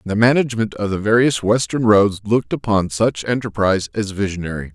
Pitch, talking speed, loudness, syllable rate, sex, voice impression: 105 Hz, 165 wpm, -18 LUFS, 5.7 syllables/s, male, very masculine, very adult-like, old, very thick, slightly tensed, powerful, bright, slightly soft, slightly clear, fluent, slightly raspy, very cool, intellectual, slightly refreshing, sincere, calm, very mature, friendly, reassuring, very unique, wild, very lively, kind, slightly intense